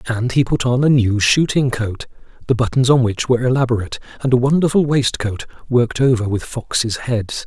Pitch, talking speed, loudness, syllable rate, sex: 125 Hz, 185 wpm, -17 LUFS, 5.6 syllables/s, male